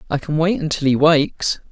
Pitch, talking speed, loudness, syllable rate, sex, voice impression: 155 Hz, 210 wpm, -18 LUFS, 6.3 syllables/s, male, very masculine, very adult-like, very middle-aged, very thick, slightly tensed, powerful, slightly bright, slightly soft, slightly muffled, fluent, slightly raspy, very cool, intellectual, slightly refreshing, sincere, very calm, mature, friendly, reassuring, unique, elegant, wild, sweet, lively, kind, slightly modest